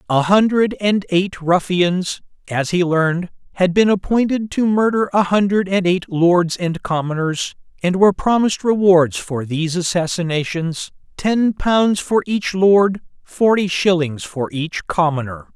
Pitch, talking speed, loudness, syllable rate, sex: 185 Hz, 145 wpm, -17 LUFS, 4.3 syllables/s, male